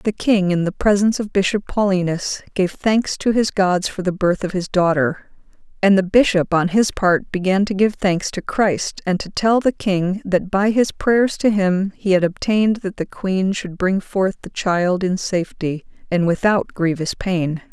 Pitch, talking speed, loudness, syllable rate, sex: 190 Hz, 200 wpm, -19 LUFS, 4.4 syllables/s, female